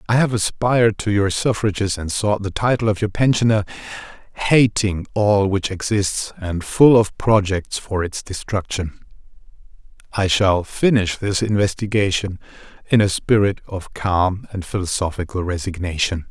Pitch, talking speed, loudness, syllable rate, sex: 100 Hz, 135 wpm, -19 LUFS, 4.6 syllables/s, male